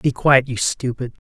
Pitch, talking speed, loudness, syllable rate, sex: 130 Hz, 190 wpm, -18 LUFS, 4.4 syllables/s, male